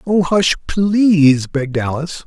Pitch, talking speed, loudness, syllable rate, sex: 165 Hz, 135 wpm, -15 LUFS, 4.5 syllables/s, male